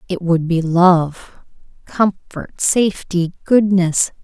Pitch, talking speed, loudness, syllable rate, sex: 180 Hz, 100 wpm, -16 LUFS, 3.3 syllables/s, female